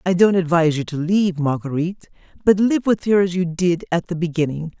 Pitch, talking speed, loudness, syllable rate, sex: 175 Hz, 215 wpm, -19 LUFS, 5.9 syllables/s, female